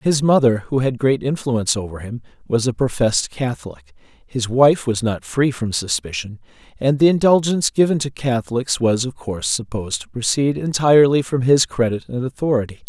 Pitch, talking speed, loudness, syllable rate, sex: 125 Hz, 170 wpm, -18 LUFS, 5.4 syllables/s, male